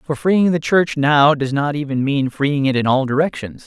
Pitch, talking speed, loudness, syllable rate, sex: 145 Hz, 230 wpm, -17 LUFS, 4.8 syllables/s, male